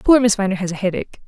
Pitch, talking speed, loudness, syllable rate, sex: 200 Hz, 280 wpm, -18 LUFS, 7.9 syllables/s, female